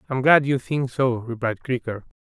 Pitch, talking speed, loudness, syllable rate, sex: 125 Hz, 190 wpm, -22 LUFS, 4.8 syllables/s, male